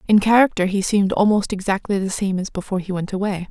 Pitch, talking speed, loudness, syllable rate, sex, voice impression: 195 Hz, 220 wpm, -19 LUFS, 6.6 syllables/s, female, feminine, adult-like, soft, slightly fluent, slightly intellectual, calm, elegant